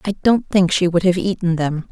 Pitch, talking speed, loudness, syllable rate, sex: 180 Hz, 250 wpm, -17 LUFS, 5.0 syllables/s, female